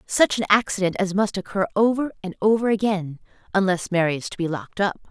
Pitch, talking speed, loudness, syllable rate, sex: 195 Hz, 190 wpm, -22 LUFS, 6.1 syllables/s, female